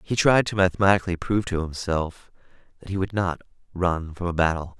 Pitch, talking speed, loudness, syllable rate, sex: 90 Hz, 190 wpm, -24 LUFS, 5.9 syllables/s, male